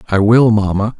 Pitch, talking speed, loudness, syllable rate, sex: 105 Hz, 180 wpm, -12 LUFS, 5.2 syllables/s, male